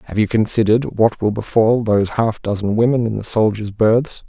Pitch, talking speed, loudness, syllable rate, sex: 110 Hz, 195 wpm, -17 LUFS, 5.4 syllables/s, male